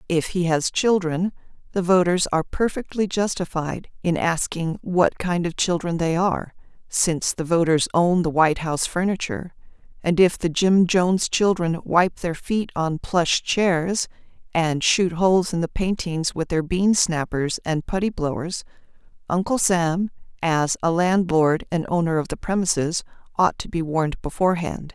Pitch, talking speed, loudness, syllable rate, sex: 175 Hz, 155 wpm, -22 LUFS, 4.6 syllables/s, female